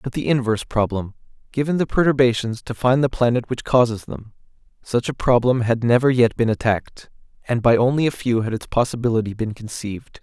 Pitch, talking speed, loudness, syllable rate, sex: 120 Hz, 180 wpm, -20 LUFS, 5.8 syllables/s, male